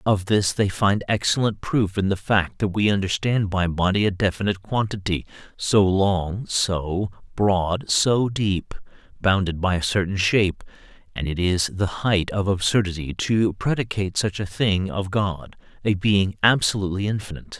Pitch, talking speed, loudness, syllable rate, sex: 100 Hz, 155 wpm, -22 LUFS, 4.6 syllables/s, male